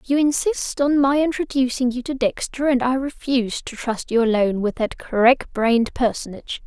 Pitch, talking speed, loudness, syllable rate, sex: 255 Hz, 180 wpm, -20 LUFS, 5.2 syllables/s, female